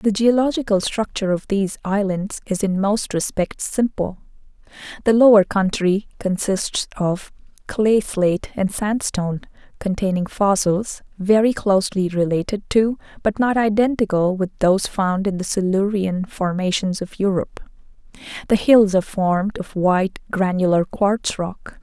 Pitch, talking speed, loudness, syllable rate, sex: 200 Hz, 130 wpm, -20 LUFS, 4.6 syllables/s, female